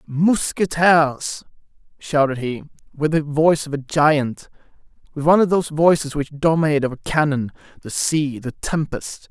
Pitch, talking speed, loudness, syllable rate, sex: 150 Hz, 140 wpm, -19 LUFS, 4.9 syllables/s, male